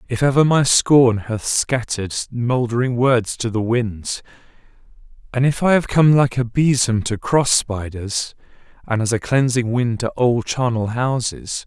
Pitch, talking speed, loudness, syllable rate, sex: 120 Hz, 160 wpm, -18 LUFS, 4.2 syllables/s, male